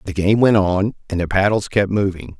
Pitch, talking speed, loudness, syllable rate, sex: 95 Hz, 225 wpm, -18 LUFS, 5.3 syllables/s, male